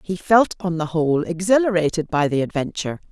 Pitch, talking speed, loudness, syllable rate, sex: 175 Hz, 175 wpm, -20 LUFS, 5.9 syllables/s, female